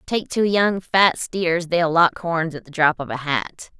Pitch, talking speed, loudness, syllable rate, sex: 170 Hz, 220 wpm, -20 LUFS, 3.9 syllables/s, female